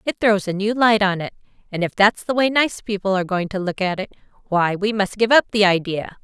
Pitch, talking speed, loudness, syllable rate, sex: 200 Hz, 260 wpm, -19 LUFS, 5.6 syllables/s, female